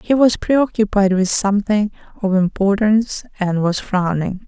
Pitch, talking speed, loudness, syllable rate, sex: 205 Hz, 135 wpm, -17 LUFS, 4.6 syllables/s, female